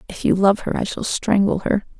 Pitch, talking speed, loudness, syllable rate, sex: 200 Hz, 240 wpm, -19 LUFS, 5.4 syllables/s, female